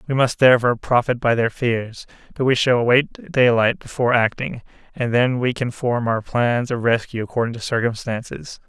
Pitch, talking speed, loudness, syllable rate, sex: 120 Hz, 180 wpm, -19 LUFS, 5.2 syllables/s, male